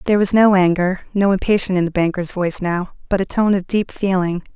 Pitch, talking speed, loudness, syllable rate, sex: 185 Hz, 225 wpm, -18 LUFS, 6.1 syllables/s, female